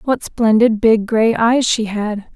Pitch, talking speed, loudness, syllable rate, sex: 225 Hz, 180 wpm, -15 LUFS, 3.6 syllables/s, female